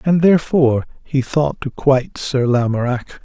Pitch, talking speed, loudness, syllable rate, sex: 135 Hz, 150 wpm, -17 LUFS, 4.7 syllables/s, male